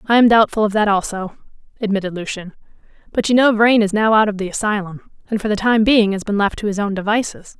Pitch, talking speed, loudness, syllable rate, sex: 210 Hz, 235 wpm, -17 LUFS, 6.1 syllables/s, female